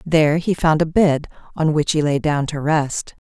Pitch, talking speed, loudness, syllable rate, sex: 155 Hz, 220 wpm, -18 LUFS, 4.7 syllables/s, female